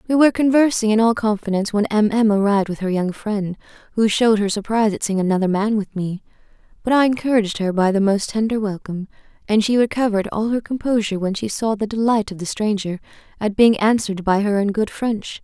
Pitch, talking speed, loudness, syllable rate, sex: 210 Hz, 215 wpm, -19 LUFS, 6.2 syllables/s, female